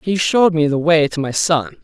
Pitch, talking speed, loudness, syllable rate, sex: 160 Hz, 260 wpm, -16 LUFS, 5.3 syllables/s, male